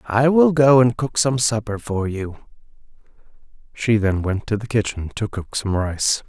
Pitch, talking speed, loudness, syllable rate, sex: 110 Hz, 180 wpm, -19 LUFS, 4.4 syllables/s, male